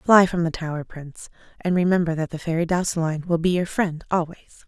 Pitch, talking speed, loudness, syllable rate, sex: 170 Hz, 205 wpm, -23 LUFS, 6.3 syllables/s, female